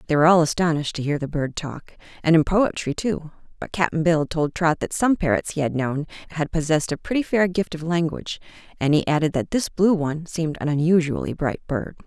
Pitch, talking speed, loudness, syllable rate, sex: 160 Hz, 210 wpm, -22 LUFS, 5.9 syllables/s, female